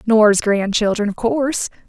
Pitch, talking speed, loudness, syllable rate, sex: 215 Hz, 130 wpm, -17 LUFS, 5.0 syllables/s, female